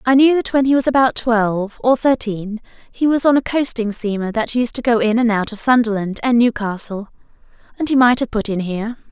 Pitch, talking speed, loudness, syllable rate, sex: 230 Hz, 225 wpm, -17 LUFS, 5.6 syllables/s, female